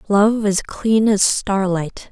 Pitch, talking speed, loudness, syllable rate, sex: 205 Hz, 140 wpm, -17 LUFS, 3.2 syllables/s, female